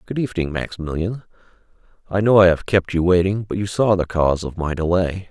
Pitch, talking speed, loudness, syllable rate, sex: 90 Hz, 205 wpm, -19 LUFS, 6.0 syllables/s, male